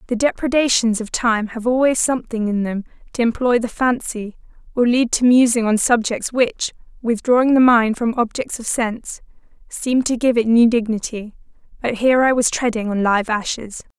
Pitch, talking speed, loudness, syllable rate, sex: 235 Hz, 175 wpm, -18 LUFS, 5.2 syllables/s, female